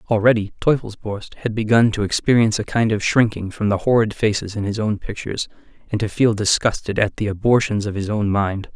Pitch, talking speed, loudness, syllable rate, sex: 105 Hz, 200 wpm, -19 LUFS, 5.7 syllables/s, male